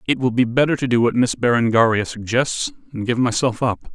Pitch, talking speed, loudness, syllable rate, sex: 125 Hz, 215 wpm, -19 LUFS, 5.8 syllables/s, male